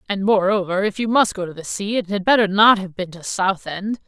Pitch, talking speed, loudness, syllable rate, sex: 200 Hz, 265 wpm, -19 LUFS, 5.5 syllables/s, female